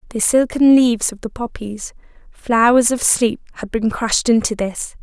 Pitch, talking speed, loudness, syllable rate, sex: 230 Hz, 145 wpm, -16 LUFS, 4.8 syllables/s, female